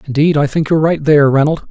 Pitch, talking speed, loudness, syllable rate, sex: 150 Hz, 245 wpm, -12 LUFS, 7.1 syllables/s, male